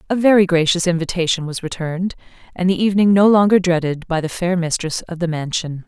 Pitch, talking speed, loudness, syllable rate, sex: 175 Hz, 195 wpm, -17 LUFS, 6.1 syllables/s, female